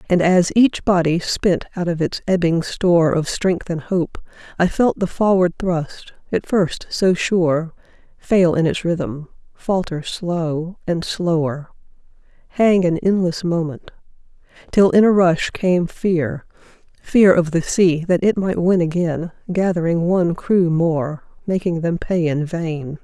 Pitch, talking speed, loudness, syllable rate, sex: 170 Hz, 155 wpm, -18 LUFS, 3.9 syllables/s, female